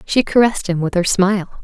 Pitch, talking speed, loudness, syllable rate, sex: 195 Hz, 220 wpm, -16 LUFS, 6.5 syllables/s, female